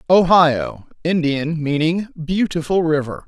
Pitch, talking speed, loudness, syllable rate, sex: 160 Hz, 75 wpm, -18 LUFS, 3.9 syllables/s, male